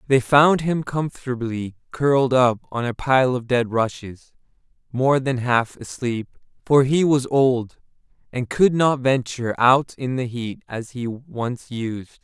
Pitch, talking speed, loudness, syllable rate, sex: 125 Hz, 155 wpm, -21 LUFS, 3.9 syllables/s, male